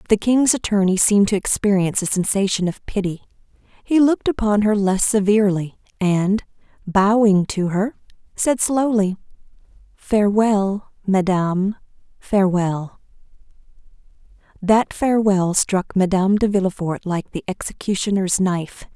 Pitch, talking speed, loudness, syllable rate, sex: 200 Hz, 110 wpm, -19 LUFS, 4.8 syllables/s, female